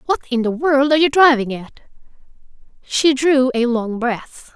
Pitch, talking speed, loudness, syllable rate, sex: 260 Hz, 170 wpm, -16 LUFS, 4.8 syllables/s, female